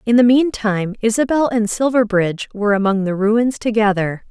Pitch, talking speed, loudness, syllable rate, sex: 220 Hz, 155 wpm, -17 LUFS, 5.5 syllables/s, female